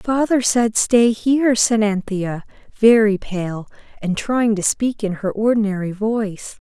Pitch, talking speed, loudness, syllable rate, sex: 215 Hz, 145 wpm, -18 LUFS, 4.1 syllables/s, female